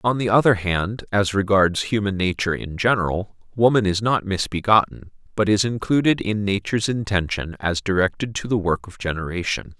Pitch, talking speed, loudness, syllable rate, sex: 100 Hz, 165 wpm, -21 LUFS, 5.3 syllables/s, male